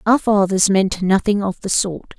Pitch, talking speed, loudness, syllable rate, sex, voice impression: 195 Hz, 190 wpm, -17 LUFS, 4.4 syllables/s, female, feminine, middle-aged, tensed, slightly powerful, slightly hard, clear, raspy, intellectual, calm, reassuring, elegant, slightly kind, slightly sharp